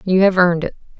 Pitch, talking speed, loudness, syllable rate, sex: 180 Hz, 240 wpm, -15 LUFS, 7.4 syllables/s, female